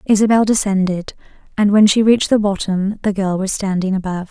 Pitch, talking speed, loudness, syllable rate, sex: 200 Hz, 180 wpm, -16 LUFS, 5.9 syllables/s, female